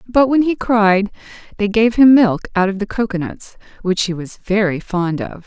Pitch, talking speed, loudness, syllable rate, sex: 205 Hz, 200 wpm, -16 LUFS, 4.6 syllables/s, female